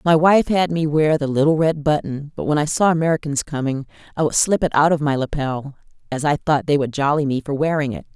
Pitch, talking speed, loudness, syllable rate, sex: 150 Hz, 245 wpm, -19 LUFS, 5.8 syllables/s, female